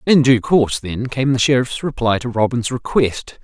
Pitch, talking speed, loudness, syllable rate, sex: 125 Hz, 190 wpm, -17 LUFS, 4.8 syllables/s, male